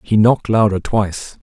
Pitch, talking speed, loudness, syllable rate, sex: 105 Hz, 160 wpm, -16 LUFS, 5.3 syllables/s, male